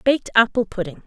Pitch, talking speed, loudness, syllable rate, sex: 215 Hz, 170 wpm, -19 LUFS, 6.5 syllables/s, female